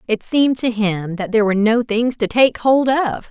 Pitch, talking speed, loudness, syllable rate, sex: 230 Hz, 235 wpm, -17 LUFS, 5.1 syllables/s, female